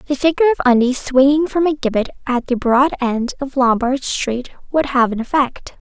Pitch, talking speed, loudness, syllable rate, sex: 265 Hz, 195 wpm, -17 LUFS, 5.1 syllables/s, female